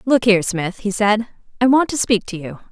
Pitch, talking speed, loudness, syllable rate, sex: 215 Hz, 245 wpm, -17 LUFS, 5.5 syllables/s, female